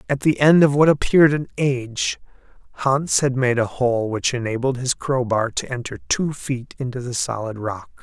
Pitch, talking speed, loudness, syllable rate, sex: 125 Hz, 185 wpm, -20 LUFS, 4.9 syllables/s, male